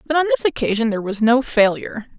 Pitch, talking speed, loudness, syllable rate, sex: 255 Hz, 220 wpm, -18 LUFS, 7.0 syllables/s, female